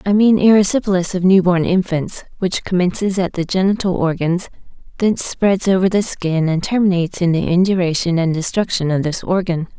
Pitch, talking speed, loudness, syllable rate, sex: 180 Hz, 170 wpm, -16 LUFS, 5.5 syllables/s, female